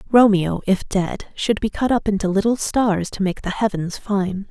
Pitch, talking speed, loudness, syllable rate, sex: 200 Hz, 200 wpm, -20 LUFS, 4.6 syllables/s, female